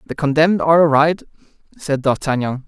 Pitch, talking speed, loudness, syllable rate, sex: 150 Hz, 135 wpm, -16 LUFS, 6.6 syllables/s, male